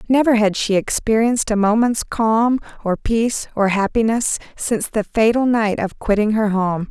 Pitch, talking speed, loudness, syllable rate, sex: 220 Hz, 165 wpm, -18 LUFS, 4.8 syllables/s, female